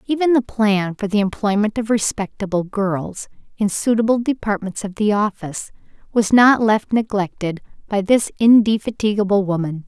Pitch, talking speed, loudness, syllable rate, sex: 210 Hz, 140 wpm, -18 LUFS, 5.0 syllables/s, female